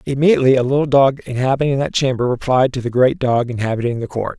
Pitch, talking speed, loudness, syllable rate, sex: 130 Hz, 205 wpm, -16 LUFS, 6.6 syllables/s, male